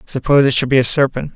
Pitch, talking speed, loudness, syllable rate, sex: 135 Hz, 265 wpm, -14 LUFS, 7.4 syllables/s, male